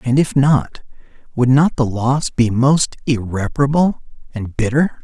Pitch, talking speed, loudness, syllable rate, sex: 130 Hz, 145 wpm, -16 LUFS, 4.3 syllables/s, male